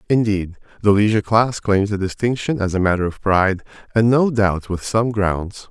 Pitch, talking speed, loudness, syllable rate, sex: 105 Hz, 190 wpm, -18 LUFS, 5.1 syllables/s, male